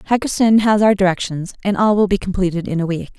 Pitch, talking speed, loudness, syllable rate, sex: 195 Hz, 225 wpm, -17 LUFS, 6.3 syllables/s, female